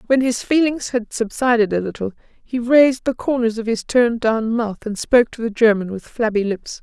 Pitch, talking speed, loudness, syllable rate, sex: 230 Hz, 210 wpm, -19 LUFS, 5.3 syllables/s, female